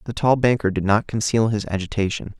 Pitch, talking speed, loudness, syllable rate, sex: 110 Hz, 200 wpm, -21 LUFS, 5.8 syllables/s, male